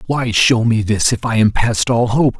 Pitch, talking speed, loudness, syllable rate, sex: 115 Hz, 250 wpm, -15 LUFS, 4.5 syllables/s, male